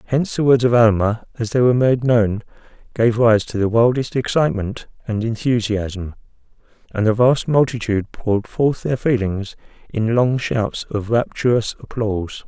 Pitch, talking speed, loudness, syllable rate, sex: 115 Hz, 155 wpm, -18 LUFS, 4.8 syllables/s, male